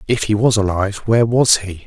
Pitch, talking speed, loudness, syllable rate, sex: 105 Hz, 225 wpm, -16 LUFS, 6.0 syllables/s, male